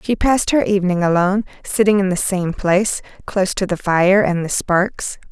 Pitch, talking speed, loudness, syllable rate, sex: 190 Hz, 190 wpm, -17 LUFS, 5.3 syllables/s, female